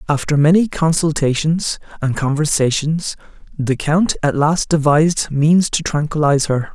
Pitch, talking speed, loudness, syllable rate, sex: 150 Hz, 125 wpm, -16 LUFS, 4.6 syllables/s, male